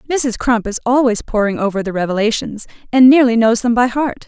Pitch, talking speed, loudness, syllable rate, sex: 235 Hz, 195 wpm, -15 LUFS, 5.8 syllables/s, female